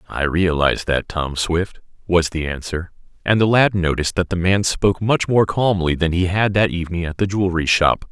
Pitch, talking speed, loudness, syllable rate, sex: 90 Hz, 205 wpm, -18 LUFS, 5.3 syllables/s, male